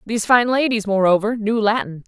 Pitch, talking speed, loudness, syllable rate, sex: 215 Hz, 175 wpm, -18 LUFS, 5.6 syllables/s, female